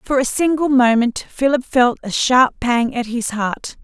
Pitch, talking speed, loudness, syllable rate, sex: 250 Hz, 190 wpm, -17 LUFS, 4.2 syllables/s, female